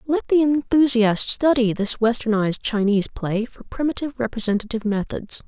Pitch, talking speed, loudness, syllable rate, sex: 235 Hz, 130 wpm, -20 LUFS, 5.5 syllables/s, female